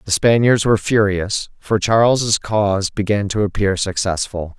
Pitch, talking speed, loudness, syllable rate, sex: 105 Hz, 145 wpm, -17 LUFS, 4.6 syllables/s, male